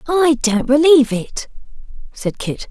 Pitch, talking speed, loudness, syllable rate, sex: 270 Hz, 135 wpm, -15 LUFS, 4.3 syllables/s, female